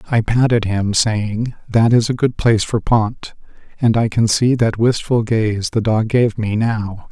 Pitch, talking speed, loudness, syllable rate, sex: 110 Hz, 195 wpm, -16 LUFS, 4.1 syllables/s, male